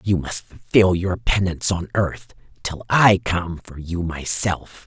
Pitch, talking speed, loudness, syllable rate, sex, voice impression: 90 Hz, 160 wpm, -21 LUFS, 3.9 syllables/s, female, very feminine, very middle-aged, slightly raspy, slightly calm